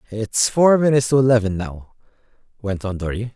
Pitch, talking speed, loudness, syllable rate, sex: 115 Hz, 160 wpm, -18 LUFS, 5.7 syllables/s, male